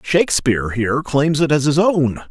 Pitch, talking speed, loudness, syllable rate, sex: 140 Hz, 180 wpm, -17 LUFS, 5.1 syllables/s, male